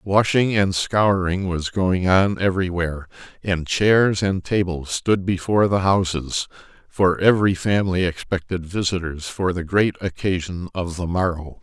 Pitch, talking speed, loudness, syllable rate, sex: 90 Hz, 135 wpm, -21 LUFS, 4.5 syllables/s, male